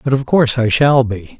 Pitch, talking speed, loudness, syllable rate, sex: 125 Hz, 260 wpm, -14 LUFS, 5.4 syllables/s, male